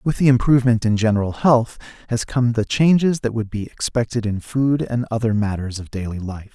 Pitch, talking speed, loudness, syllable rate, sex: 115 Hz, 200 wpm, -19 LUFS, 5.4 syllables/s, male